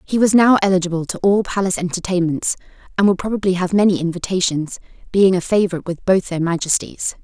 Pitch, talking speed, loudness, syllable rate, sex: 185 Hz, 175 wpm, -18 LUFS, 6.4 syllables/s, female